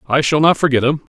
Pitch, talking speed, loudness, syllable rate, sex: 145 Hz, 260 wpm, -15 LUFS, 6.4 syllables/s, male